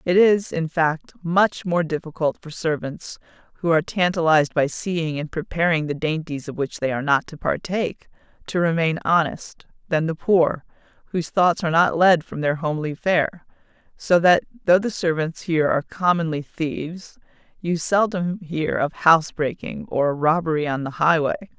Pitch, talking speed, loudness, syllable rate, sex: 165 Hz, 165 wpm, -21 LUFS, 4.9 syllables/s, female